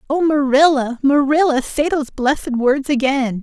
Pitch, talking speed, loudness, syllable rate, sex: 275 Hz, 140 wpm, -16 LUFS, 4.7 syllables/s, female